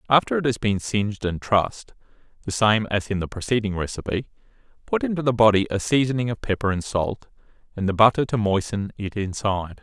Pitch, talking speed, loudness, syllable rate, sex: 105 Hz, 190 wpm, -23 LUFS, 5.9 syllables/s, male